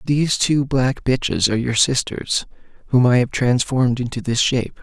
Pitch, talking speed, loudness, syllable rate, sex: 125 Hz, 175 wpm, -18 LUFS, 5.3 syllables/s, male